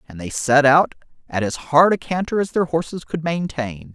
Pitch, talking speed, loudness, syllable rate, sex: 150 Hz, 215 wpm, -19 LUFS, 4.9 syllables/s, male